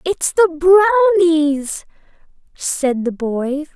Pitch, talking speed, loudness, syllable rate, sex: 320 Hz, 95 wpm, -15 LUFS, 3.1 syllables/s, female